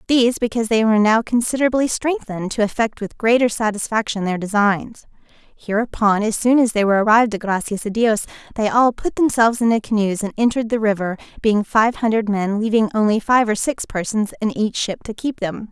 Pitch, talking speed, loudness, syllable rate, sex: 220 Hz, 195 wpm, -18 LUFS, 5.9 syllables/s, female